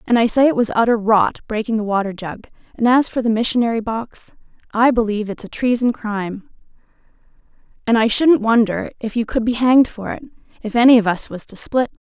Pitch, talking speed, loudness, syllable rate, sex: 225 Hz, 205 wpm, -17 LUFS, 5.9 syllables/s, female